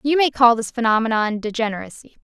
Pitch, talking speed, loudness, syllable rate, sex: 235 Hz, 160 wpm, -18 LUFS, 6.2 syllables/s, female